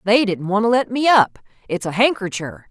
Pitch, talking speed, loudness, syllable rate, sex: 210 Hz, 220 wpm, -18 LUFS, 5.2 syllables/s, female